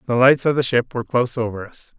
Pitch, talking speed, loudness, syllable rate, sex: 125 Hz, 270 wpm, -19 LUFS, 6.7 syllables/s, male